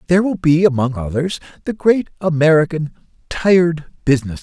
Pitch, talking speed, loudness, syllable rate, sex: 160 Hz, 150 wpm, -16 LUFS, 6.0 syllables/s, male